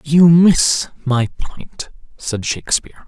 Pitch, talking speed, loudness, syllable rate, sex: 145 Hz, 115 wpm, -15 LUFS, 3.8 syllables/s, male